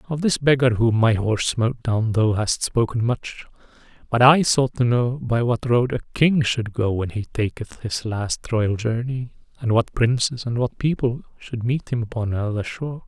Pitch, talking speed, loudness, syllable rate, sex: 120 Hz, 195 wpm, -21 LUFS, 4.7 syllables/s, male